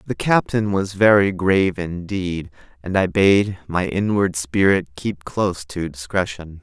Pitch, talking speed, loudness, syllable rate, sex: 90 Hz, 145 wpm, -20 LUFS, 4.1 syllables/s, male